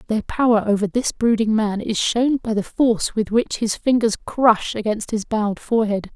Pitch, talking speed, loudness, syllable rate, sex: 220 Hz, 195 wpm, -20 LUFS, 5.0 syllables/s, female